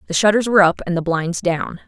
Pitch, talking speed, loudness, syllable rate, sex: 185 Hz, 255 wpm, -17 LUFS, 6.2 syllables/s, female